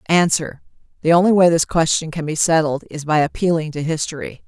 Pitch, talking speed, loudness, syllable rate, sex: 160 Hz, 190 wpm, -18 LUFS, 5.6 syllables/s, female